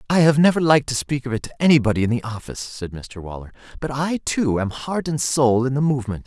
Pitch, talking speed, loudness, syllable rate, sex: 130 Hz, 250 wpm, -20 LUFS, 6.3 syllables/s, male